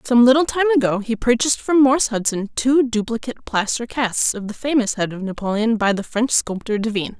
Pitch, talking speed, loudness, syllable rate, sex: 235 Hz, 200 wpm, -19 LUFS, 5.7 syllables/s, female